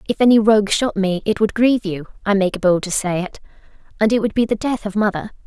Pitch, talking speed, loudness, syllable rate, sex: 205 Hz, 250 wpm, -18 LUFS, 6.2 syllables/s, female